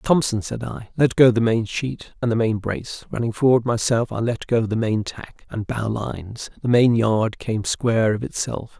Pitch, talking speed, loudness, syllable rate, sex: 115 Hz, 205 wpm, -21 LUFS, 4.7 syllables/s, male